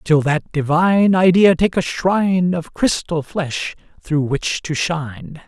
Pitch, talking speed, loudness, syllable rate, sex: 165 Hz, 155 wpm, -17 LUFS, 4.0 syllables/s, male